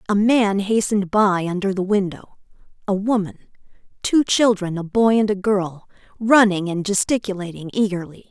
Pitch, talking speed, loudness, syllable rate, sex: 200 Hz, 145 wpm, -19 LUFS, 5.0 syllables/s, female